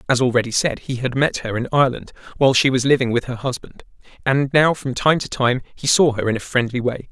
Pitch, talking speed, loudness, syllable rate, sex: 130 Hz, 245 wpm, -19 LUFS, 6.1 syllables/s, male